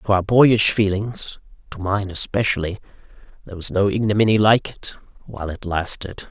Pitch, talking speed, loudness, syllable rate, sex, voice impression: 100 Hz, 150 wpm, -19 LUFS, 4.7 syllables/s, male, masculine, adult-like, slightly middle-aged, thick, very tensed, very powerful, very bright, soft, very clear, fluent, cool, intellectual, very refreshing, sincere, calm, slightly mature, friendly, reassuring, unique, wild, slightly sweet, very lively, very kind, slightly intense